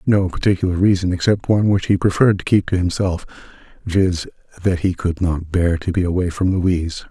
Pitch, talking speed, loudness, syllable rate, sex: 90 Hz, 185 wpm, -18 LUFS, 5.7 syllables/s, male